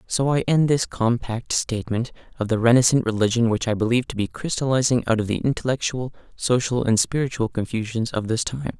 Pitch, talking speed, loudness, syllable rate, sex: 120 Hz, 185 wpm, -22 LUFS, 5.8 syllables/s, male